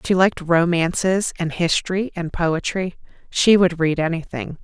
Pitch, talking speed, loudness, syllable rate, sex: 175 Hz, 140 wpm, -20 LUFS, 4.6 syllables/s, female